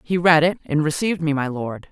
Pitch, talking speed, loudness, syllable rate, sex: 160 Hz, 250 wpm, -20 LUFS, 5.8 syllables/s, female